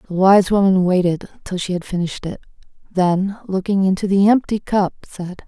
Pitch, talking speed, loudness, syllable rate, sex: 190 Hz, 165 wpm, -18 LUFS, 5.2 syllables/s, female